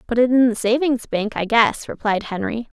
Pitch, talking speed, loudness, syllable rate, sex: 230 Hz, 215 wpm, -19 LUFS, 5.1 syllables/s, female